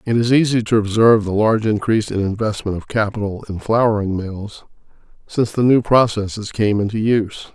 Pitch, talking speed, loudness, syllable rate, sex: 110 Hz, 175 wpm, -17 LUFS, 5.7 syllables/s, male